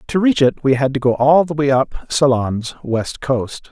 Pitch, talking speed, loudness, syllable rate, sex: 135 Hz, 225 wpm, -17 LUFS, 4.4 syllables/s, male